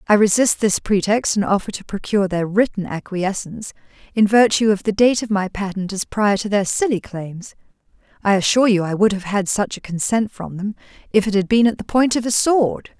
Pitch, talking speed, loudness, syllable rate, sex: 205 Hz, 215 wpm, -18 LUFS, 5.5 syllables/s, female